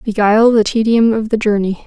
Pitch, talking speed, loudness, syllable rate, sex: 215 Hz, 195 wpm, -13 LUFS, 5.7 syllables/s, female